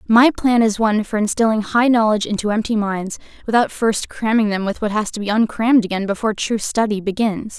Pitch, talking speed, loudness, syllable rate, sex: 215 Hz, 205 wpm, -18 LUFS, 5.9 syllables/s, female